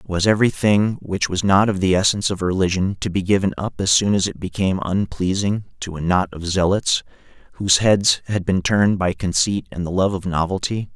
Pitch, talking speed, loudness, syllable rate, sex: 95 Hz, 210 wpm, -19 LUFS, 5.5 syllables/s, male